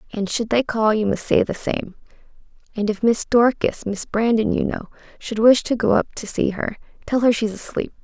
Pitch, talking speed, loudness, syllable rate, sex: 220 Hz, 210 wpm, -20 LUFS, 5.0 syllables/s, female